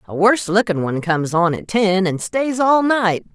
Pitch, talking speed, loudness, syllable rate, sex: 195 Hz, 215 wpm, -17 LUFS, 5.1 syllables/s, female